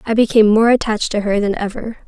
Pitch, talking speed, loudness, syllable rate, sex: 220 Hz, 230 wpm, -15 LUFS, 6.9 syllables/s, female